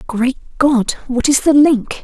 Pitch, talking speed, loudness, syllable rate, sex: 260 Hz, 175 wpm, -14 LUFS, 3.6 syllables/s, female